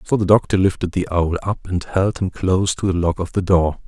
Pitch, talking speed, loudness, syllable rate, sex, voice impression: 90 Hz, 265 wpm, -19 LUFS, 5.5 syllables/s, male, masculine, adult-like, cool, sincere, calm, reassuring, sweet